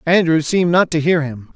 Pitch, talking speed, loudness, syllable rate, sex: 160 Hz, 230 wpm, -16 LUFS, 5.6 syllables/s, male